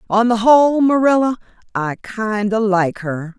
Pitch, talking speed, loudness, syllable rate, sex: 220 Hz, 160 wpm, -16 LUFS, 4.4 syllables/s, female